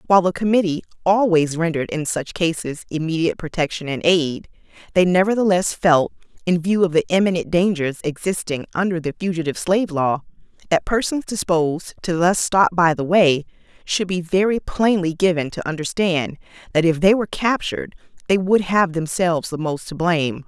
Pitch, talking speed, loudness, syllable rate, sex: 175 Hz, 165 wpm, -19 LUFS, 5.5 syllables/s, female